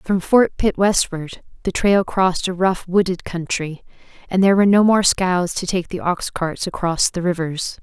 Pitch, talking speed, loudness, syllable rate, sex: 185 Hz, 190 wpm, -18 LUFS, 4.7 syllables/s, female